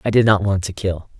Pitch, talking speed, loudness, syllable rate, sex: 100 Hz, 300 wpm, -19 LUFS, 5.8 syllables/s, male